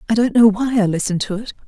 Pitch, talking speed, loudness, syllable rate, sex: 215 Hz, 285 wpm, -17 LUFS, 7.1 syllables/s, female